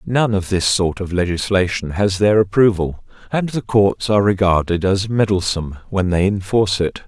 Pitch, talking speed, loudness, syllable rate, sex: 95 Hz, 170 wpm, -17 LUFS, 5.0 syllables/s, male